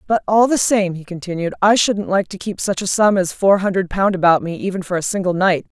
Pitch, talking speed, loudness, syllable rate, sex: 190 Hz, 260 wpm, -17 LUFS, 5.7 syllables/s, female